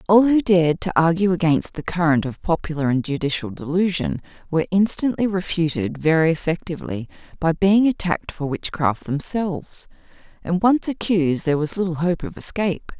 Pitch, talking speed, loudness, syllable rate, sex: 170 Hz, 150 wpm, -21 LUFS, 5.5 syllables/s, female